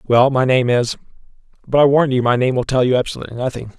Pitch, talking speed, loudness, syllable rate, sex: 130 Hz, 220 wpm, -16 LUFS, 6.7 syllables/s, male